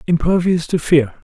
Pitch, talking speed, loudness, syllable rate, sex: 165 Hz, 135 wpm, -16 LUFS, 4.6 syllables/s, male